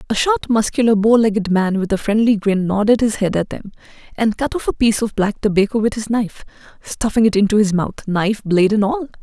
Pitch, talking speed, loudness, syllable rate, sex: 215 Hz, 220 wpm, -17 LUFS, 5.9 syllables/s, female